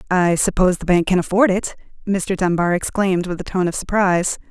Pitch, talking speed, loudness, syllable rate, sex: 185 Hz, 200 wpm, -18 LUFS, 6.0 syllables/s, female